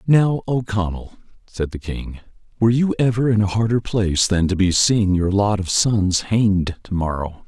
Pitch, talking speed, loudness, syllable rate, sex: 100 Hz, 195 wpm, -19 LUFS, 4.8 syllables/s, male